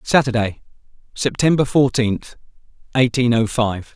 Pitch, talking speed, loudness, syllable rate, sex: 120 Hz, 90 wpm, -18 LUFS, 4.4 syllables/s, male